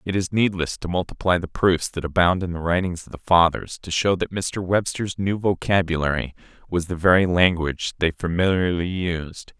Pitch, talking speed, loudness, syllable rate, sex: 90 Hz, 180 wpm, -22 LUFS, 5.1 syllables/s, male